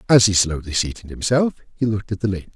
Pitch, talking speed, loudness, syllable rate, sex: 100 Hz, 235 wpm, -20 LUFS, 7.1 syllables/s, male